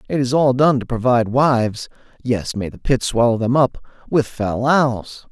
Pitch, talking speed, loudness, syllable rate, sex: 125 Hz, 170 wpm, -18 LUFS, 4.7 syllables/s, male